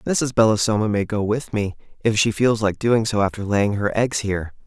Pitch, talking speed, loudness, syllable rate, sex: 110 Hz, 220 wpm, -20 LUFS, 5.1 syllables/s, male